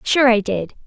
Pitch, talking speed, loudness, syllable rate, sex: 230 Hz, 210 wpm, -17 LUFS, 4.6 syllables/s, female